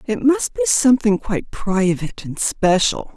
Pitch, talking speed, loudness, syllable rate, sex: 225 Hz, 150 wpm, -18 LUFS, 4.8 syllables/s, female